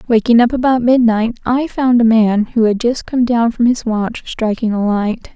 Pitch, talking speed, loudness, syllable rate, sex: 230 Hz, 215 wpm, -14 LUFS, 4.5 syllables/s, female